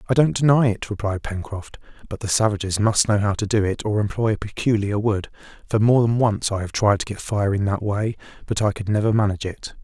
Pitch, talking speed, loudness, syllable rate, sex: 105 Hz, 240 wpm, -21 LUFS, 5.8 syllables/s, male